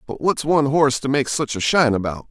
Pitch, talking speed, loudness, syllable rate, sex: 135 Hz, 260 wpm, -19 LUFS, 6.7 syllables/s, male